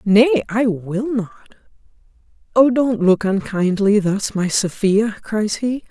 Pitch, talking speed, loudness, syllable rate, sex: 210 Hz, 120 wpm, -18 LUFS, 3.4 syllables/s, female